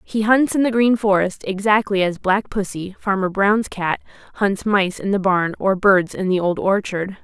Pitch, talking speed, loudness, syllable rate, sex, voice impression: 195 Hz, 200 wpm, -19 LUFS, 4.5 syllables/s, female, very feminine, slightly young, slightly thin, tensed, slightly powerful, slightly dark, slightly hard, clear, fluent, cute, intellectual, very refreshing, sincere, calm, very friendly, reassuring, unique, elegant, slightly wild, sweet, lively, kind, slightly intense, slightly light